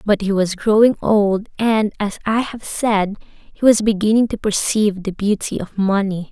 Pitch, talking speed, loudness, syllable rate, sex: 205 Hz, 180 wpm, -18 LUFS, 4.5 syllables/s, female